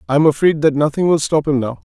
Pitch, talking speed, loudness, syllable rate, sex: 150 Hz, 280 wpm, -16 LUFS, 6.5 syllables/s, male